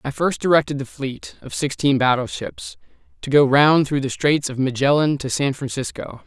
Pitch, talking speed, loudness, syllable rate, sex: 140 Hz, 180 wpm, -20 LUFS, 4.9 syllables/s, male